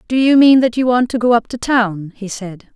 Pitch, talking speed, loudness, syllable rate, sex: 230 Hz, 285 wpm, -13 LUFS, 5.3 syllables/s, female